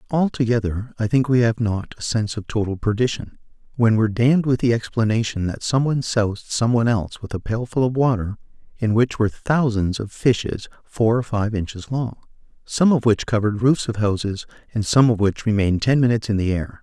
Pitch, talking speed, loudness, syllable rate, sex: 115 Hz, 195 wpm, -20 LUFS, 5.8 syllables/s, male